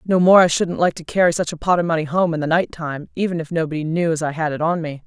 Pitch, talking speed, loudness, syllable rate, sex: 165 Hz, 320 wpm, -19 LUFS, 6.5 syllables/s, female